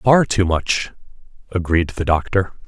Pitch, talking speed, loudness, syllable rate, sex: 95 Hz, 135 wpm, -19 LUFS, 4.0 syllables/s, male